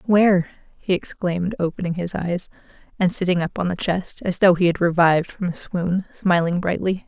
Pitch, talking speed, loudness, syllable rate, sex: 180 Hz, 185 wpm, -21 LUFS, 5.3 syllables/s, female